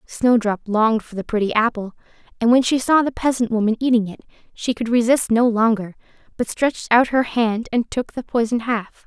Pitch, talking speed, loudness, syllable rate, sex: 230 Hz, 200 wpm, -19 LUFS, 5.5 syllables/s, female